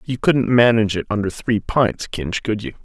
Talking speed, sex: 210 wpm, male